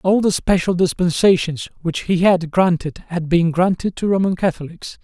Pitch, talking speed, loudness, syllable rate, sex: 175 Hz, 165 wpm, -18 LUFS, 4.9 syllables/s, male